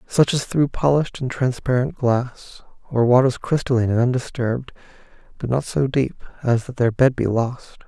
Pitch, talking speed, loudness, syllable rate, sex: 125 Hz, 170 wpm, -20 LUFS, 5.1 syllables/s, male